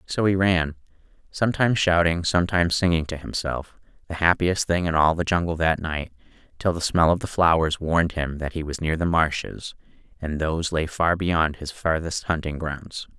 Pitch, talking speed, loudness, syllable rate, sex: 85 Hz, 185 wpm, -23 LUFS, 5.2 syllables/s, male